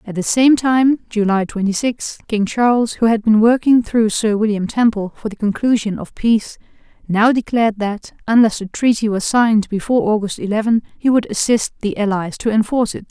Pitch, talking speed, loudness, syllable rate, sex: 220 Hz, 190 wpm, -16 LUFS, 5.2 syllables/s, female